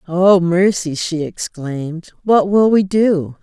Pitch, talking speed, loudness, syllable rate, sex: 180 Hz, 140 wpm, -15 LUFS, 3.6 syllables/s, female